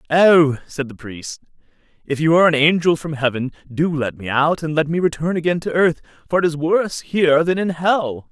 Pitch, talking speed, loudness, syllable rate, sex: 160 Hz, 215 wpm, -18 LUFS, 5.3 syllables/s, male